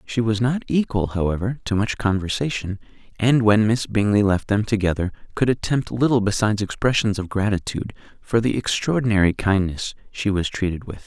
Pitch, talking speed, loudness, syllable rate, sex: 105 Hz, 165 wpm, -21 LUFS, 5.5 syllables/s, male